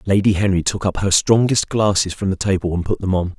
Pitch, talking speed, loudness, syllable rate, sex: 95 Hz, 250 wpm, -18 LUFS, 5.9 syllables/s, male